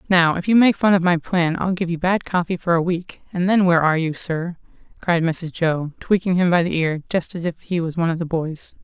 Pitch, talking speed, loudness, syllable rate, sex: 175 Hz, 265 wpm, -20 LUFS, 5.5 syllables/s, female